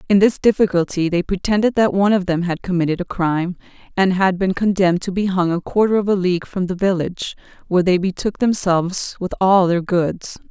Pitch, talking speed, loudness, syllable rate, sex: 185 Hz, 205 wpm, -18 LUFS, 5.8 syllables/s, female